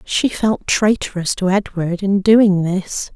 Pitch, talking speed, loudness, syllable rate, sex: 195 Hz, 150 wpm, -17 LUFS, 3.6 syllables/s, female